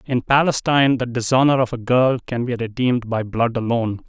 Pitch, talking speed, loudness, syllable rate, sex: 120 Hz, 190 wpm, -19 LUFS, 5.7 syllables/s, male